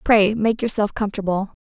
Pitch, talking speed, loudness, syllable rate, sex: 210 Hz, 150 wpm, -20 LUFS, 5.6 syllables/s, female